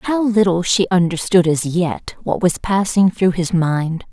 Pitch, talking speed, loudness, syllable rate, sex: 180 Hz, 175 wpm, -17 LUFS, 4.1 syllables/s, female